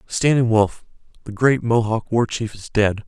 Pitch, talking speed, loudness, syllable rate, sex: 115 Hz, 175 wpm, -19 LUFS, 4.5 syllables/s, male